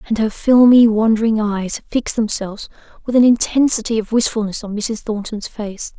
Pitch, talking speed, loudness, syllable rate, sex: 220 Hz, 160 wpm, -16 LUFS, 5.2 syllables/s, female